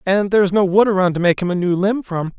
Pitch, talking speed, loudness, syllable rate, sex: 190 Hz, 325 wpm, -17 LUFS, 6.7 syllables/s, male